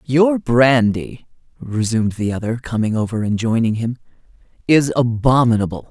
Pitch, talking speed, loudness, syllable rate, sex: 120 Hz, 120 wpm, -17 LUFS, 4.9 syllables/s, male